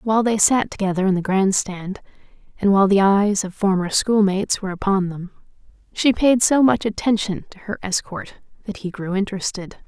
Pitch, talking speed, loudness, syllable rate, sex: 200 Hz, 180 wpm, -19 LUFS, 5.4 syllables/s, female